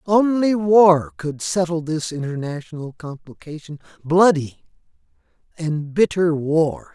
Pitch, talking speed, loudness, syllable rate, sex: 165 Hz, 85 wpm, -19 LUFS, 3.9 syllables/s, male